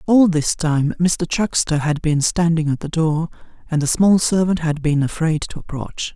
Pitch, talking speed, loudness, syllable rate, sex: 160 Hz, 195 wpm, -18 LUFS, 4.5 syllables/s, male